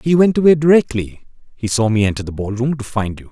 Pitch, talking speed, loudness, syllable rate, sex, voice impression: 125 Hz, 255 wpm, -16 LUFS, 6.0 syllables/s, male, very masculine, very adult-like, middle-aged, very thick, slightly relaxed, slightly powerful, slightly dark, soft, slightly muffled, fluent, slightly raspy, very cool, intellectual, sincere, very calm, very mature, friendly, reassuring, wild, very kind, slightly modest